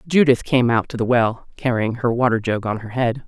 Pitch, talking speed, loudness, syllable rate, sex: 120 Hz, 240 wpm, -19 LUFS, 5.3 syllables/s, female